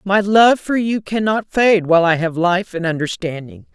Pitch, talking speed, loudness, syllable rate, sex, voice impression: 185 Hz, 190 wpm, -16 LUFS, 4.7 syllables/s, female, very feminine, middle-aged, thin, tensed, slightly weak, dark, hard, clear, fluent, slightly cool, intellectual, very refreshing, very sincere, slightly calm, slightly friendly, slightly reassuring, very unique, slightly elegant, very wild, sweet, very lively, strict, intense, sharp